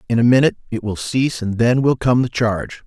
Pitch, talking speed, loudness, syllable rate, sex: 120 Hz, 250 wpm, -17 LUFS, 6.3 syllables/s, male